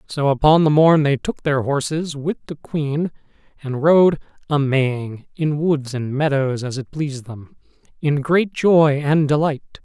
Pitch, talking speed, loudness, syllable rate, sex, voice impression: 145 Hz, 170 wpm, -19 LUFS, 4.0 syllables/s, male, masculine, adult-like, refreshing, slightly sincere, friendly